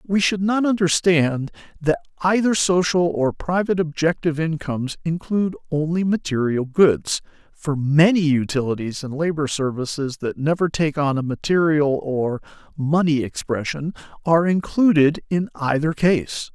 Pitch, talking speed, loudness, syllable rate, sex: 160 Hz, 125 wpm, -20 LUFS, 4.7 syllables/s, male